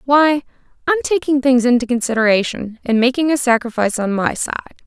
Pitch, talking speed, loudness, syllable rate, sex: 255 Hz, 160 wpm, -17 LUFS, 5.8 syllables/s, female